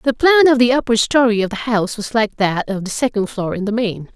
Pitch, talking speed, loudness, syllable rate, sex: 225 Hz, 275 wpm, -16 LUFS, 5.7 syllables/s, female